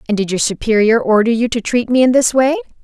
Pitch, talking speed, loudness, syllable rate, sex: 225 Hz, 255 wpm, -14 LUFS, 6.2 syllables/s, female